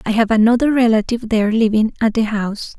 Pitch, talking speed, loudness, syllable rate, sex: 220 Hz, 195 wpm, -16 LUFS, 6.6 syllables/s, female